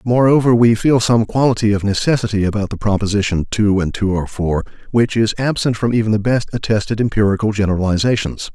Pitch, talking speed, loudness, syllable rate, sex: 110 Hz, 175 wpm, -16 LUFS, 6.1 syllables/s, male